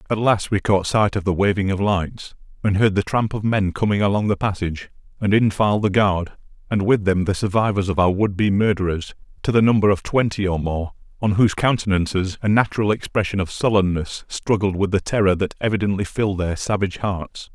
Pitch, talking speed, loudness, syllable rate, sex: 100 Hz, 205 wpm, -20 LUFS, 5.7 syllables/s, male